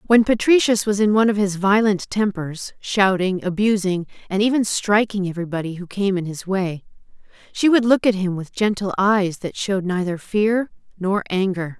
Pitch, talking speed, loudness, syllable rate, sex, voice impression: 195 Hz, 175 wpm, -20 LUFS, 5.0 syllables/s, female, feminine, slightly adult-like, slightly intellectual, slightly calm